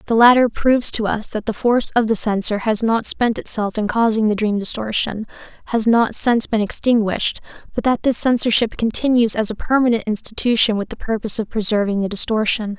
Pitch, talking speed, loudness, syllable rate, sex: 220 Hz, 190 wpm, -18 LUFS, 5.8 syllables/s, female